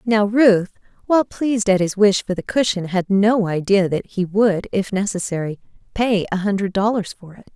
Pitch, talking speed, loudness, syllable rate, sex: 200 Hz, 190 wpm, -19 LUFS, 5.0 syllables/s, female